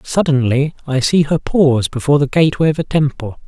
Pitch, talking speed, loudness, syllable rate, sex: 145 Hz, 190 wpm, -15 LUFS, 5.9 syllables/s, male